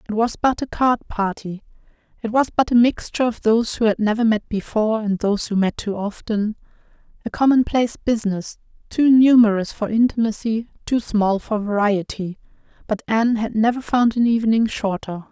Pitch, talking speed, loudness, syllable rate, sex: 220 Hz, 170 wpm, -19 LUFS, 5.5 syllables/s, female